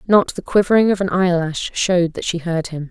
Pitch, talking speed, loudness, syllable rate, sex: 180 Hz, 225 wpm, -18 LUFS, 5.5 syllables/s, female